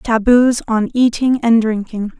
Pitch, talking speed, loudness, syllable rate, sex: 230 Hz, 135 wpm, -14 LUFS, 3.8 syllables/s, female